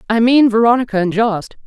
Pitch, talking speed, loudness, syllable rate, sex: 225 Hz, 180 wpm, -14 LUFS, 5.6 syllables/s, female